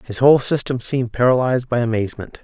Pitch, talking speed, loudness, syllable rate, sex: 125 Hz, 175 wpm, -18 LUFS, 7.0 syllables/s, male